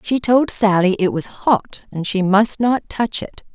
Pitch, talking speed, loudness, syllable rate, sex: 210 Hz, 205 wpm, -17 LUFS, 4.0 syllables/s, female